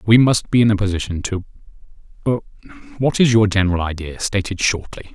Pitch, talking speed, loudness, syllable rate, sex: 100 Hz, 150 wpm, -18 LUFS, 5.9 syllables/s, male